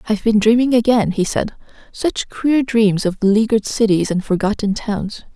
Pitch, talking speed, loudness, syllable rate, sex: 215 Hz, 170 wpm, -17 LUFS, 4.9 syllables/s, female